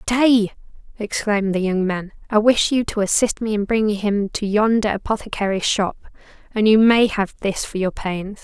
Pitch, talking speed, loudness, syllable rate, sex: 210 Hz, 185 wpm, -19 LUFS, 5.0 syllables/s, female